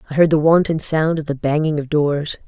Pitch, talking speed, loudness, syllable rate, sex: 155 Hz, 245 wpm, -17 LUFS, 5.4 syllables/s, female